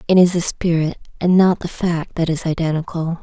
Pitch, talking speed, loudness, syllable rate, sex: 170 Hz, 205 wpm, -18 LUFS, 5.1 syllables/s, female